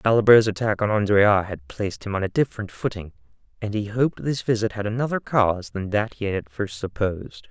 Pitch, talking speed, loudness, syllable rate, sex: 105 Hz, 210 wpm, -23 LUFS, 5.8 syllables/s, male